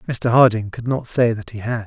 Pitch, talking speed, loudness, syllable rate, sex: 115 Hz, 260 wpm, -19 LUFS, 5.3 syllables/s, male